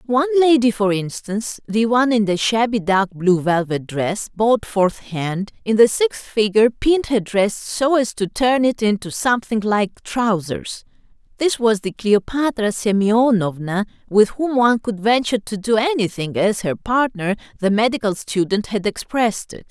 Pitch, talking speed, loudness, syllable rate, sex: 215 Hz, 160 wpm, -18 LUFS, 4.6 syllables/s, female